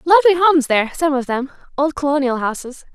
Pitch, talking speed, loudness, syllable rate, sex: 290 Hz, 165 wpm, -17 LUFS, 6.6 syllables/s, female